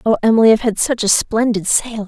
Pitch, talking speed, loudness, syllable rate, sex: 220 Hz, 230 wpm, -14 LUFS, 6.3 syllables/s, female